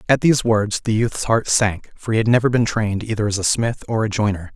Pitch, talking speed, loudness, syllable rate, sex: 110 Hz, 265 wpm, -19 LUFS, 5.8 syllables/s, male